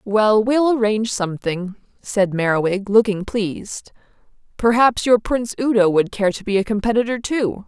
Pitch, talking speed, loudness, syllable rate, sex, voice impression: 215 Hz, 150 wpm, -18 LUFS, 5.0 syllables/s, female, feminine, adult-like, clear, slightly intellectual, slightly lively